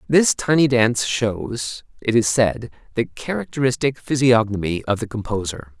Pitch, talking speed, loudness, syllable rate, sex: 115 Hz, 135 wpm, -20 LUFS, 4.7 syllables/s, male